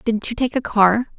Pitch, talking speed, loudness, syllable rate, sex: 230 Hz, 255 wpm, -18 LUFS, 4.7 syllables/s, female